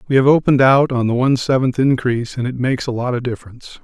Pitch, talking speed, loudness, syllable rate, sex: 125 Hz, 250 wpm, -16 LUFS, 7.1 syllables/s, male